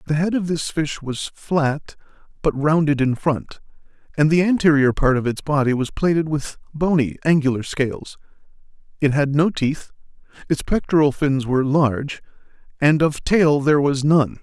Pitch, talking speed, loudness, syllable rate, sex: 145 Hz, 160 wpm, -19 LUFS, 4.9 syllables/s, male